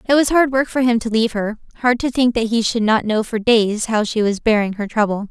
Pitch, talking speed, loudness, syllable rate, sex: 225 Hz, 270 wpm, -17 LUFS, 5.7 syllables/s, female